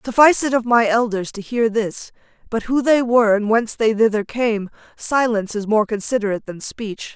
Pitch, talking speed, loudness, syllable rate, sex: 225 Hz, 195 wpm, -18 LUFS, 5.5 syllables/s, female